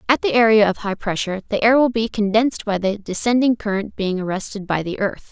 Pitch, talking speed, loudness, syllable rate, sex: 210 Hz, 225 wpm, -19 LUFS, 6.0 syllables/s, female